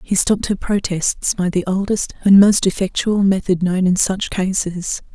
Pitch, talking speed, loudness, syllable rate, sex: 190 Hz, 175 wpm, -17 LUFS, 4.6 syllables/s, female